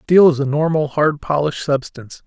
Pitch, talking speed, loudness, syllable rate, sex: 145 Hz, 185 wpm, -17 LUFS, 5.4 syllables/s, male